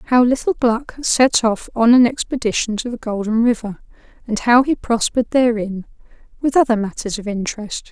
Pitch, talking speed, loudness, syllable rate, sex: 235 Hz, 165 wpm, -17 LUFS, 5.2 syllables/s, female